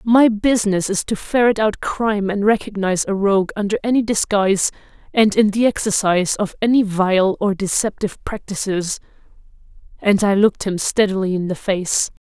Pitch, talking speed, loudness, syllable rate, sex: 205 Hz, 155 wpm, -18 LUFS, 5.3 syllables/s, female